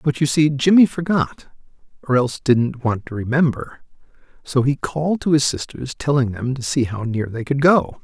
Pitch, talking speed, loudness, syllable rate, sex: 135 Hz, 195 wpm, -19 LUFS, 5.1 syllables/s, male